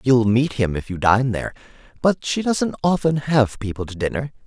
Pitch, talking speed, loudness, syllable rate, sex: 125 Hz, 200 wpm, -20 LUFS, 5.1 syllables/s, male